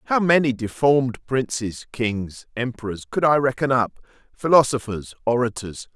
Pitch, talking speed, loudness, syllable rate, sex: 125 Hz, 120 wpm, -22 LUFS, 4.8 syllables/s, male